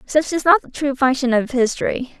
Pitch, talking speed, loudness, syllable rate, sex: 270 Hz, 220 wpm, -18 LUFS, 5.3 syllables/s, female